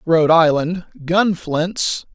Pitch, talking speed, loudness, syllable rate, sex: 165 Hz, 110 wpm, -17 LUFS, 3.3 syllables/s, male